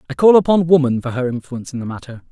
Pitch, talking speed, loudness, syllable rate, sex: 140 Hz, 260 wpm, -16 LUFS, 7.2 syllables/s, male